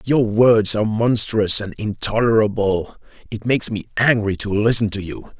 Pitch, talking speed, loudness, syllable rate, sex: 110 Hz, 155 wpm, -18 LUFS, 4.8 syllables/s, male